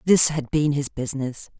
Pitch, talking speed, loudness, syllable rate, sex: 140 Hz, 190 wpm, -22 LUFS, 5.2 syllables/s, female